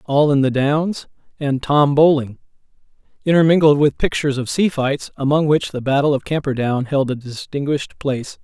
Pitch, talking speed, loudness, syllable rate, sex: 140 Hz, 165 wpm, -18 LUFS, 5.2 syllables/s, male